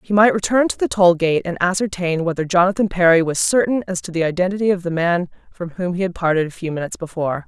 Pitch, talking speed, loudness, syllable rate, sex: 180 Hz, 240 wpm, -18 LUFS, 6.4 syllables/s, female